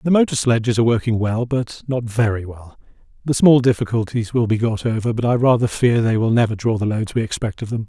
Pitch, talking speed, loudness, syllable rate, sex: 115 Hz, 235 wpm, -18 LUFS, 5.9 syllables/s, male